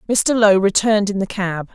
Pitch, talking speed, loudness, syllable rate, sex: 200 Hz, 205 wpm, -16 LUFS, 5.8 syllables/s, female